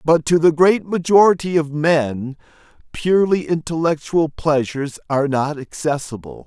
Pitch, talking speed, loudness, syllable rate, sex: 155 Hz, 120 wpm, -18 LUFS, 4.7 syllables/s, male